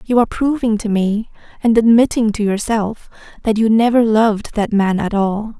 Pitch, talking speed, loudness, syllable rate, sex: 220 Hz, 180 wpm, -16 LUFS, 5.0 syllables/s, female